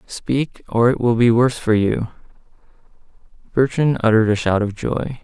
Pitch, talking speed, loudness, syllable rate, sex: 120 Hz, 160 wpm, -18 LUFS, 4.9 syllables/s, male